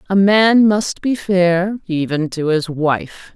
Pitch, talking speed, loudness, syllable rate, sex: 185 Hz, 160 wpm, -16 LUFS, 3.3 syllables/s, female